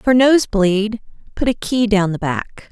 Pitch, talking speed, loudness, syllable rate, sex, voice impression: 215 Hz, 200 wpm, -17 LUFS, 3.9 syllables/s, female, very feminine, adult-like, clear, slightly intellectual, slightly lively